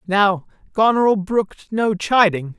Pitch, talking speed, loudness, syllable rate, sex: 200 Hz, 115 wpm, -18 LUFS, 4.1 syllables/s, male